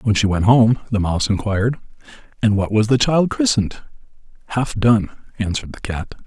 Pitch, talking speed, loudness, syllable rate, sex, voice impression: 110 Hz, 170 wpm, -18 LUFS, 5.7 syllables/s, male, masculine, middle-aged, thick, tensed, powerful, soft, clear, cool, sincere, calm, mature, friendly, reassuring, wild, lively, slightly kind